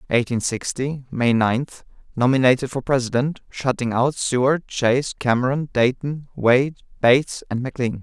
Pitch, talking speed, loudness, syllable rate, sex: 130 Hz, 120 wpm, -21 LUFS, 5.2 syllables/s, male